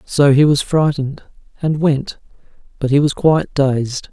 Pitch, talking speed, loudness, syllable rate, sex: 145 Hz, 160 wpm, -16 LUFS, 4.5 syllables/s, male